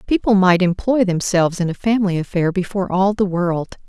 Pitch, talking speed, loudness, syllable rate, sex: 190 Hz, 185 wpm, -18 LUFS, 5.9 syllables/s, female